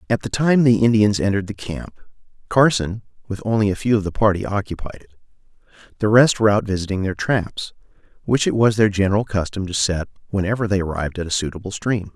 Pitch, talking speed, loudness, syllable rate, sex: 105 Hz, 200 wpm, -19 LUFS, 6.2 syllables/s, male